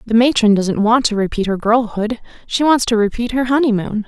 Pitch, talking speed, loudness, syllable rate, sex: 225 Hz, 190 wpm, -16 LUFS, 5.4 syllables/s, female